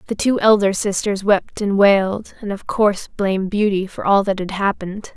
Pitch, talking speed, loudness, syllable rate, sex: 200 Hz, 200 wpm, -18 LUFS, 5.2 syllables/s, female